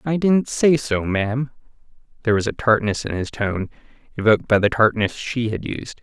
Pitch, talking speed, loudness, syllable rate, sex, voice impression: 115 Hz, 190 wpm, -20 LUFS, 5.3 syllables/s, male, masculine, adult-like, slightly middle-aged, slightly thick, slightly tensed, slightly weak, slightly dark, slightly soft, muffled, slightly halting, slightly raspy, slightly cool, intellectual, slightly refreshing, sincere, calm, slightly mature, slightly friendly, reassuring, unique, slightly wild, kind, very modest